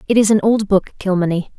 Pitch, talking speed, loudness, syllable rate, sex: 200 Hz, 225 wpm, -16 LUFS, 5.9 syllables/s, female